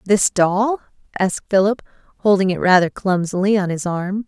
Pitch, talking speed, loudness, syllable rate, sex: 195 Hz, 155 wpm, -18 LUFS, 5.2 syllables/s, female